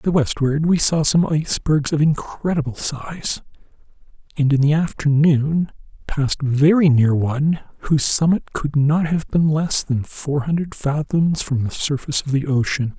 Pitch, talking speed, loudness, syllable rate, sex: 150 Hz, 160 wpm, -19 LUFS, 4.6 syllables/s, male